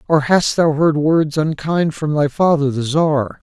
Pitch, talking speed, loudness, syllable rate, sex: 150 Hz, 190 wpm, -16 LUFS, 4.0 syllables/s, male